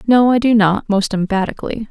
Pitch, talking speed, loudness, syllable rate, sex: 215 Hz, 190 wpm, -15 LUFS, 5.7 syllables/s, female